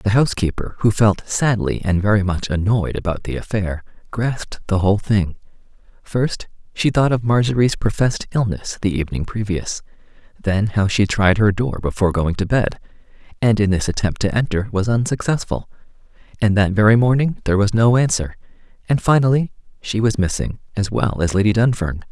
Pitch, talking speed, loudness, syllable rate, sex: 105 Hz, 165 wpm, -19 LUFS, 5.4 syllables/s, male